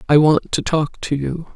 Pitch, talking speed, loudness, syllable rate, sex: 150 Hz, 230 wpm, -18 LUFS, 4.4 syllables/s, female